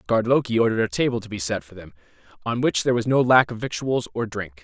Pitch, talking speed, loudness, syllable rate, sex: 115 Hz, 260 wpm, -22 LUFS, 6.8 syllables/s, male